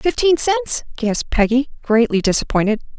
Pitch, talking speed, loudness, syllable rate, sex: 240 Hz, 120 wpm, -18 LUFS, 5.1 syllables/s, female